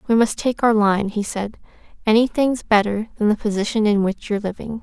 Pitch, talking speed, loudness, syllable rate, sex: 215 Hz, 200 wpm, -19 LUFS, 5.6 syllables/s, female